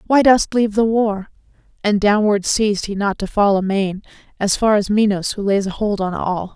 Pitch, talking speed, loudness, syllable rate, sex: 205 Hz, 200 wpm, -17 LUFS, 4.9 syllables/s, female